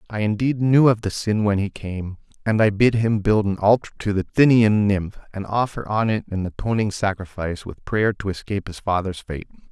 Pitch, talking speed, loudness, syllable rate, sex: 105 Hz, 210 wpm, -21 LUFS, 5.3 syllables/s, male